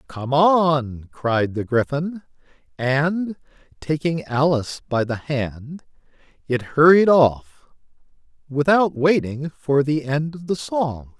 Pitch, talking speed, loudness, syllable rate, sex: 145 Hz, 120 wpm, -20 LUFS, 3.4 syllables/s, male